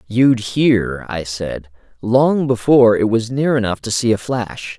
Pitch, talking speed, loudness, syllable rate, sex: 115 Hz, 175 wpm, -16 LUFS, 3.9 syllables/s, male